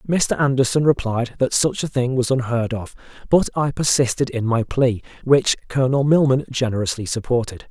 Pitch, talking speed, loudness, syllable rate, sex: 130 Hz, 165 wpm, -19 LUFS, 5.2 syllables/s, male